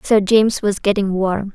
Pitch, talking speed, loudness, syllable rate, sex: 200 Hz, 195 wpm, -17 LUFS, 4.8 syllables/s, female